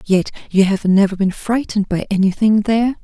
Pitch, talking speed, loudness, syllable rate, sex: 205 Hz, 180 wpm, -16 LUFS, 5.7 syllables/s, female